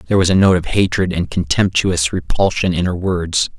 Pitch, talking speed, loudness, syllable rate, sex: 90 Hz, 200 wpm, -16 LUFS, 5.2 syllables/s, male